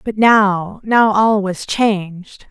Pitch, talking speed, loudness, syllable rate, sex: 205 Hz, 145 wpm, -15 LUFS, 2.9 syllables/s, female